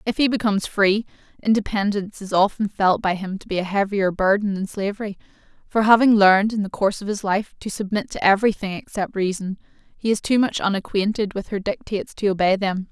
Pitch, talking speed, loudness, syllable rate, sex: 200 Hz, 200 wpm, -21 LUFS, 6.0 syllables/s, female